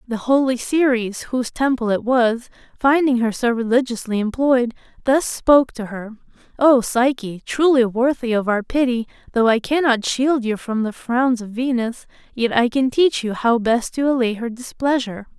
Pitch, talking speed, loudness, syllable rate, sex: 245 Hz, 170 wpm, -19 LUFS, 4.7 syllables/s, female